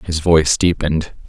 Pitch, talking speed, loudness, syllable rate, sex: 80 Hz, 140 wpm, -16 LUFS, 5.6 syllables/s, male